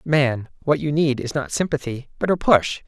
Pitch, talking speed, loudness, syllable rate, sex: 140 Hz, 210 wpm, -21 LUFS, 4.7 syllables/s, male